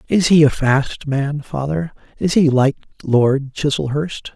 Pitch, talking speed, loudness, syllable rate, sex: 145 Hz, 150 wpm, -17 LUFS, 3.9 syllables/s, male